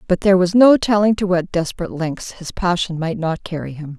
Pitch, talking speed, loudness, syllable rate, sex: 180 Hz, 225 wpm, -17 LUFS, 5.7 syllables/s, female